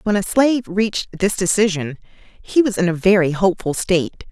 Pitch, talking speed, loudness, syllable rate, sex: 190 Hz, 180 wpm, -18 LUFS, 5.5 syllables/s, female